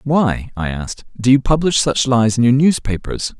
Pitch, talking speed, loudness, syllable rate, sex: 125 Hz, 195 wpm, -16 LUFS, 4.9 syllables/s, male